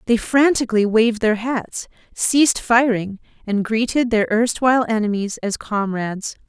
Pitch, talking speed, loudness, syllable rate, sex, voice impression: 225 Hz, 130 wpm, -18 LUFS, 4.7 syllables/s, female, feminine, adult-like, tensed, slightly bright, clear, fluent, intellectual, slightly friendly, elegant, slightly strict, slightly sharp